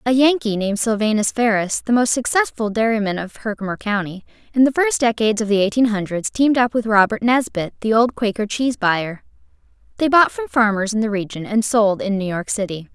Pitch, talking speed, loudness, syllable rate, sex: 220 Hz, 200 wpm, -18 LUFS, 5.7 syllables/s, female